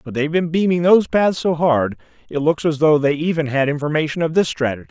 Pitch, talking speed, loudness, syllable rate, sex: 155 Hz, 235 wpm, -18 LUFS, 6.3 syllables/s, male